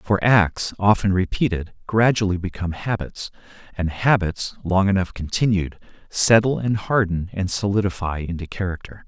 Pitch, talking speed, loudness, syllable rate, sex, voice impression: 95 Hz, 125 wpm, -21 LUFS, 4.9 syllables/s, male, very masculine, very adult-like, middle-aged, thick, tensed, slightly powerful, bright, slightly soft, slightly muffled, fluent, cool, intellectual, slightly refreshing, sincere, calm, mature, friendly, very reassuring, elegant, slightly sweet, slightly lively, very kind, slightly modest